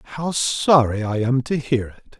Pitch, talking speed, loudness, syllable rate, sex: 130 Hz, 190 wpm, -20 LUFS, 4.7 syllables/s, male